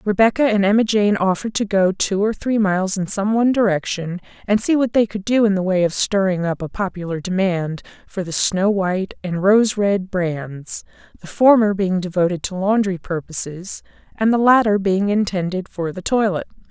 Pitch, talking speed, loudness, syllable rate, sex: 195 Hz, 190 wpm, -19 LUFS, 5.1 syllables/s, female